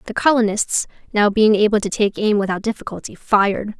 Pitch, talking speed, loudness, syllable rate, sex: 210 Hz, 175 wpm, -18 LUFS, 5.7 syllables/s, female